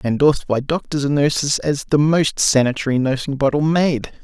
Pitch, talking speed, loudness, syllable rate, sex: 145 Hz, 170 wpm, -18 LUFS, 5.1 syllables/s, male